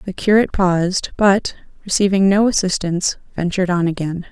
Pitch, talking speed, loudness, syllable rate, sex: 185 Hz, 140 wpm, -17 LUFS, 5.7 syllables/s, female